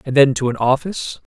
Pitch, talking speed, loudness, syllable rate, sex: 135 Hz, 230 wpm, -18 LUFS, 6.1 syllables/s, male